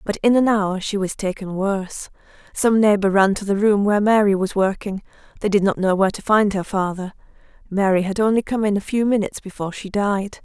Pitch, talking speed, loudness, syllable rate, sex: 200 Hz, 220 wpm, -19 LUFS, 5.8 syllables/s, female